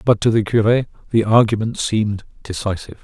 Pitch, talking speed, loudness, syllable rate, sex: 110 Hz, 160 wpm, -18 LUFS, 5.9 syllables/s, male